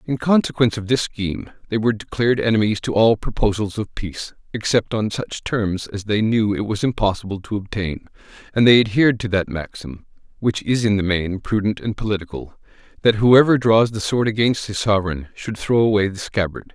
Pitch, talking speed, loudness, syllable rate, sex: 105 Hz, 190 wpm, -19 LUFS, 5.6 syllables/s, male